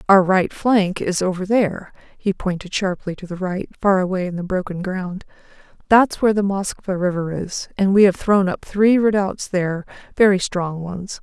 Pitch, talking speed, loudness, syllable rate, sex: 190 Hz, 175 wpm, -19 LUFS, 4.9 syllables/s, female